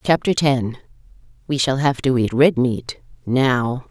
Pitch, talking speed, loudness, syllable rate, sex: 130 Hz, 140 wpm, -19 LUFS, 3.9 syllables/s, female